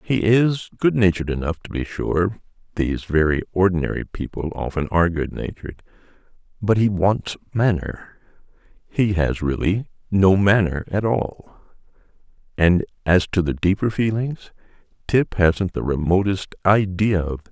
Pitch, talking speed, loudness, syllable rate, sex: 95 Hz, 125 wpm, -21 LUFS, 4.7 syllables/s, male